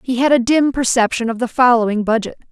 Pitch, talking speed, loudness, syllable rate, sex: 245 Hz, 215 wpm, -15 LUFS, 6.1 syllables/s, female